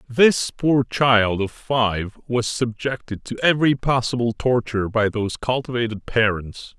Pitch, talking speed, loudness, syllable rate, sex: 115 Hz, 135 wpm, -21 LUFS, 4.3 syllables/s, male